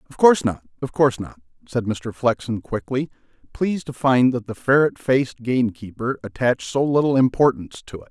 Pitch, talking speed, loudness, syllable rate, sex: 125 Hz, 180 wpm, -21 LUFS, 5.8 syllables/s, male